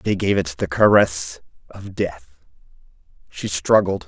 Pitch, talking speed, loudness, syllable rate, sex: 95 Hz, 135 wpm, -19 LUFS, 4.4 syllables/s, male